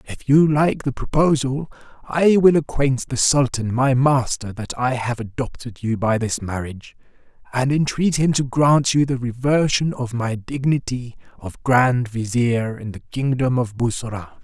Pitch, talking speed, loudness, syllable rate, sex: 130 Hz, 160 wpm, -20 LUFS, 4.3 syllables/s, male